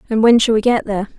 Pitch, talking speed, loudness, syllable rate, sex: 220 Hz, 305 wpm, -15 LUFS, 7.4 syllables/s, female